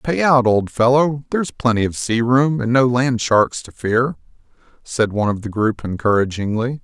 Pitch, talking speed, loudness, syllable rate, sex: 120 Hz, 185 wpm, -18 LUFS, 4.8 syllables/s, male